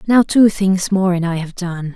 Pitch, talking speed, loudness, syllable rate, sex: 185 Hz, 245 wpm, -16 LUFS, 4.4 syllables/s, female